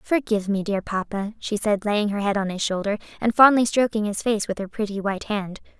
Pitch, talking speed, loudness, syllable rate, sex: 210 Hz, 230 wpm, -23 LUFS, 5.8 syllables/s, female